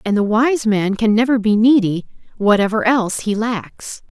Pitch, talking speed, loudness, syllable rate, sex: 220 Hz, 170 wpm, -16 LUFS, 4.7 syllables/s, female